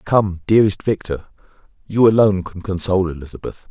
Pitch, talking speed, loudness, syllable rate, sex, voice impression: 95 Hz, 130 wpm, -18 LUFS, 6.0 syllables/s, male, very masculine, adult-like, slightly thick, cool, slightly intellectual